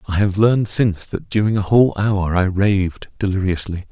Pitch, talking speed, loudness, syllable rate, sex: 100 Hz, 185 wpm, -18 LUFS, 5.4 syllables/s, male